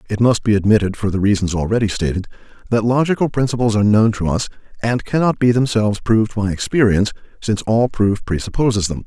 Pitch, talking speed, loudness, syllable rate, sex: 110 Hz, 185 wpm, -17 LUFS, 6.5 syllables/s, male